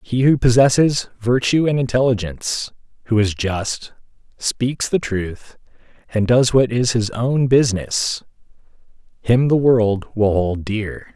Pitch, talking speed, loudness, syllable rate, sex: 115 Hz, 135 wpm, -18 LUFS, 3.9 syllables/s, male